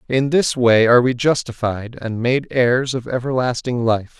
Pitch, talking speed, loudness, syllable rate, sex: 125 Hz, 170 wpm, -18 LUFS, 4.5 syllables/s, male